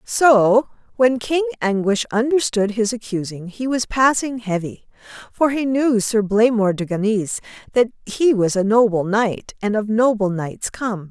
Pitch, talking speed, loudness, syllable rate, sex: 225 Hz, 155 wpm, -19 LUFS, 4.3 syllables/s, female